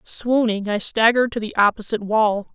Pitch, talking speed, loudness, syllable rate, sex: 220 Hz, 165 wpm, -19 LUFS, 5.4 syllables/s, female